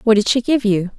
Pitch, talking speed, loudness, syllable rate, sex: 220 Hz, 305 wpm, -16 LUFS, 6.0 syllables/s, female